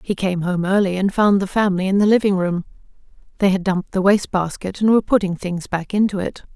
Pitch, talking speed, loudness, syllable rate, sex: 190 Hz, 220 wpm, -19 LUFS, 6.3 syllables/s, female